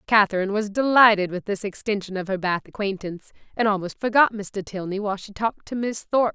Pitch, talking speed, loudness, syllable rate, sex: 205 Hz, 200 wpm, -23 LUFS, 6.4 syllables/s, female